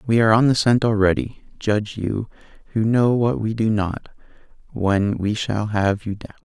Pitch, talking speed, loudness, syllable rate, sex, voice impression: 105 Hz, 185 wpm, -20 LUFS, 4.8 syllables/s, male, masculine, adult-like, relaxed, weak, dark, slightly muffled, sincere, calm, reassuring, modest